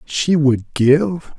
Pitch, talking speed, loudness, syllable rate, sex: 145 Hz, 130 wpm, -16 LUFS, 3.7 syllables/s, male